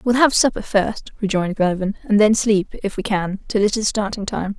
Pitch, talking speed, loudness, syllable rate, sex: 205 Hz, 220 wpm, -19 LUFS, 5.5 syllables/s, female